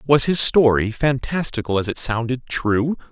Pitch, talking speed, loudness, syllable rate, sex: 125 Hz, 135 wpm, -19 LUFS, 4.5 syllables/s, male